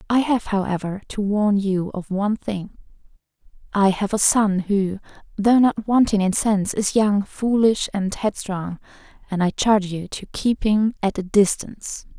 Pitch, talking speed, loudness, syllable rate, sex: 205 Hz, 165 wpm, -21 LUFS, 4.5 syllables/s, female